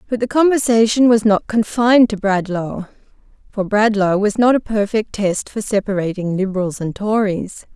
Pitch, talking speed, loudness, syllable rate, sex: 210 Hz, 155 wpm, -17 LUFS, 4.9 syllables/s, female